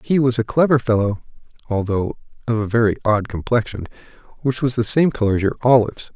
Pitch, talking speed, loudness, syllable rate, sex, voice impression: 120 Hz, 185 wpm, -19 LUFS, 6.1 syllables/s, male, very masculine, old, very thick, slightly tensed, slightly weak, slightly bright, soft, slightly clear, fluent, slightly raspy, slightly cool, intellectual, slightly refreshing, sincere, slightly calm, very mature, slightly friendly, slightly reassuring, slightly unique, slightly elegant, wild, slightly sweet, lively, kind, modest